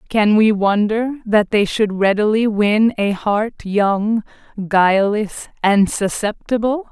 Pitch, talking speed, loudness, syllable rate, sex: 210 Hz, 120 wpm, -17 LUFS, 3.8 syllables/s, female